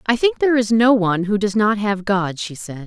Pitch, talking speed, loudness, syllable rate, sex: 210 Hz, 270 wpm, -18 LUFS, 5.5 syllables/s, female